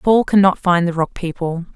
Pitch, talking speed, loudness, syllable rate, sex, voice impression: 180 Hz, 205 wpm, -17 LUFS, 5.1 syllables/s, female, feminine, adult-like, tensed, powerful, slightly bright, clear, fluent, intellectual, calm, lively, slightly sharp